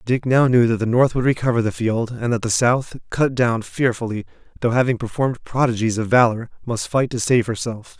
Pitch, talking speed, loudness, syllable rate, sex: 120 Hz, 210 wpm, -19 LUFS, 5.4 syllables/s, male